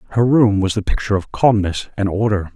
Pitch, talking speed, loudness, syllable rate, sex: 105 Hz, 210 wpm, -17 LUFS, 6.1 syllables/s, male